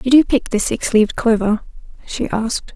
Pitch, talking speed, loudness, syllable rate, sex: 230 Hz, 195 wpm, -17 LUFS, 5.3 syllables/s, female